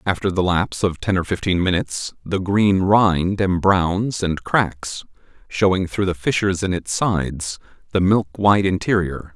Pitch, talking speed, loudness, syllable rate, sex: 95 Hz, 160 wpm, -19 LUFS, 4.5 syllables/s, male